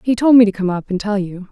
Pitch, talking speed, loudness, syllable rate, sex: 205 Hz, 355 wpm, -15 LUFS, 6.4 syllables/s, female